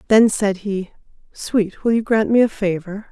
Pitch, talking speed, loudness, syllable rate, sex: 205 Hz, 195 wpm, -18 LUFS, 4.4 syllables/s, female